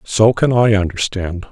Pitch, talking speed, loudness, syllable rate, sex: 105 Hz, 160 wpm, -15 LUFS, 4.4 syllables/s, male